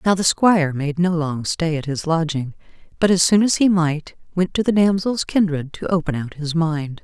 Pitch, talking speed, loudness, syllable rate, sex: 170 Hz, 220 wpm, -19 LUFS, 4.9 syllables/s, female